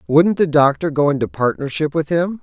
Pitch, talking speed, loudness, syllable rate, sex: 145 Hz, 200 wpm, -17 LUFS, 5.3 syllables/s, male